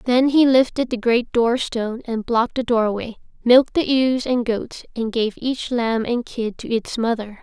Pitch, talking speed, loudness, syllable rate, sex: 235 Hz, 195 wpm, -20 LUFS, 4.4 syllables/s, female